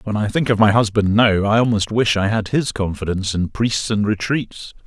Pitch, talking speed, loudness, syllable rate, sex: 105 Hz, 220 wpm, -18 LUFS, 5.2 syllables/s, male